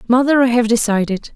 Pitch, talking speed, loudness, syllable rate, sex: 235 Hz, 180 wpm, -15 LUFS, 5.9 syllables/s, female